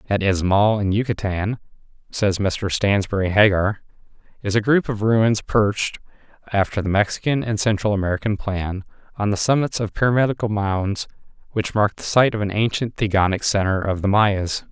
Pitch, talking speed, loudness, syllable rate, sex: 105 Hz, 160 wpm, -20 LUFS, 5.1 syllables/s, male